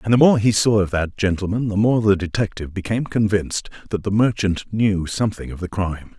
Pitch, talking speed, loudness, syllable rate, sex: 100 Hz, 215 wpm, -20 LUFS, 6.0 syllables/s, male